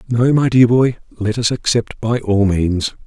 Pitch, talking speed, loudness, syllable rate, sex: 115 Hz, 195 wpm, -16 LUFS, 4.4 syllables/s, male